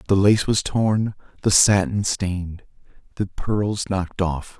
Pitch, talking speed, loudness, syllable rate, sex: 100 Hz, 145 wpm, -21 LUFS, 4.0 syllables/s, male